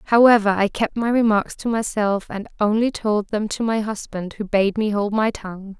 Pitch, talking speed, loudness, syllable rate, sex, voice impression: 210 Hz, 205 wpm, -20 LUFS, 5.0 syllables/s, female, feminine, slightly young, slightly cute, slightly intellectual, calm